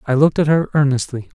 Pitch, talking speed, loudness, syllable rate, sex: 140 Hz, 215 wpm, -16 LUFS, 6.9 syllables/s, male